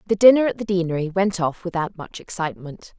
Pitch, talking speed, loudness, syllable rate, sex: 180 Hz, 200 wpm, -21 LUFS, 6.1 syllables/s, female